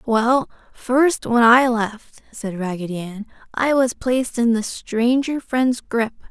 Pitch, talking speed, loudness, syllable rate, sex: 235 Hz, 150 wpm, -19 LUFS, 3.7 syllables/s, female